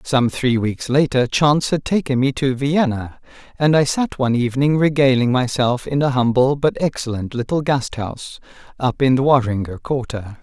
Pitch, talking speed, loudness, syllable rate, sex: 130 Hz, 165 wpm, -18 LUFS, 4.9 syllables/s, male